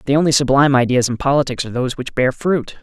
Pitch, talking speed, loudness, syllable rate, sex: 135 Hz, 235 wpm, -16 LUFS, 7.2 syllables/s, male